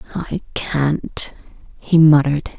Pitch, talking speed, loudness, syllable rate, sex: 155 Hz, 95 wpm, -17 LUFS, 3.5 syllables/s, female